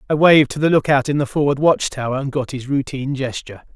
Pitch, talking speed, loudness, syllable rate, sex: 135 Hz, 240 wpm, -18 LUFS, 6.6 syllables/s, male